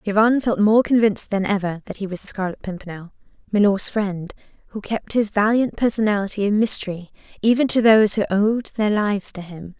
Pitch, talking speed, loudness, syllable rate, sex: 205 Hz, 170 wpm, -20 LUFS, 5.8 syllables/s, female